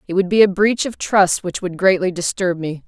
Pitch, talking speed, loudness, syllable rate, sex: 185 Hz, 250 wpm, -17 LUFS, 5.2 syllables/s, female